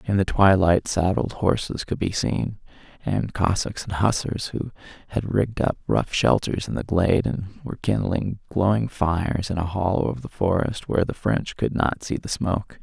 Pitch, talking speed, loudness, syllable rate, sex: 95 Hz, 185 wpm, -23 LUFS, 4.9 syllables/s, male